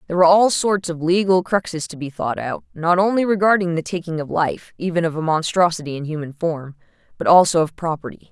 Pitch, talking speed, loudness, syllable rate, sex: 170 Hz, 210 wpm, -19 LUFS, 5.9 syllables/s, female